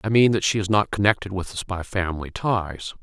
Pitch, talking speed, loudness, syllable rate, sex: 100 Hz, 240 wpm, -23 LUFS, 5.6 syllables/s, male